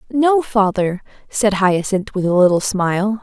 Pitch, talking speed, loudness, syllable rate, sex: 205 Hz, 150 wpm, -17 LUFS, 4.3 syllables/s, female